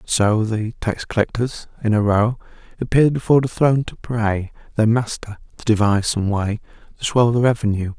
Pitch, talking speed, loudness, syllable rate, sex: 115 Hz, 175 wpm, -19 LUFS, 5.3 syllables/s, male